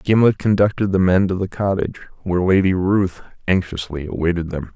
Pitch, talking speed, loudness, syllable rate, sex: 90 Hz, 165 wpm, -19 LUFS, 5.8 syllables/s, male